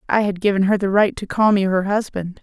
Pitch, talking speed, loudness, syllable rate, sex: 200 Hz, 275 wpm, -18 LUFS, 5.8 syllables/s, female